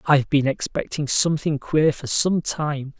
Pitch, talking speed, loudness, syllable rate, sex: 145 Hz, 160 wpm, -21 LUFS, 4.6 syllables/s, male